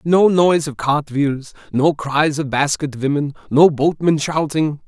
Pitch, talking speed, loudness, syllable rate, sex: 150 Hz, 160 wpm, -17 LUFS, 4.1 syllables/s, male